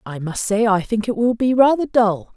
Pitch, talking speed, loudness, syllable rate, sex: 220 Hz, 255 wpm, -18 LUFS, 5.0 syllables/s, female